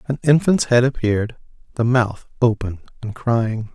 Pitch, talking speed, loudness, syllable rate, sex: 115 Hz, 145 wpm, -19 LUFS, 4.5 syllables/s, male